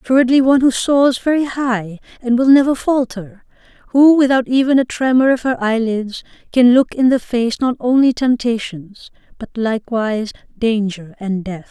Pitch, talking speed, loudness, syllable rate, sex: 240 Hz, 160 wpm, -15 LUFS, 4.9 syllables/s, female